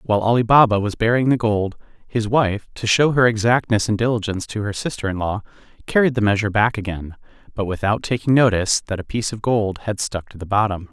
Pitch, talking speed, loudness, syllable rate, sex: 110 Hz, 215 wpm, -19 LUFS, 6.1 syllables/s, male